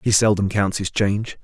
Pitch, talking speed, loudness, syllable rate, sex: 100 Hz, 210 wpm, -20 LUFS, 5.3 syllables/s, male